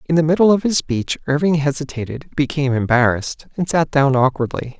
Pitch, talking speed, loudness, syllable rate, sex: 145 Hz, 175 wpm, -18 LUFS, 5.8 syllables/s, male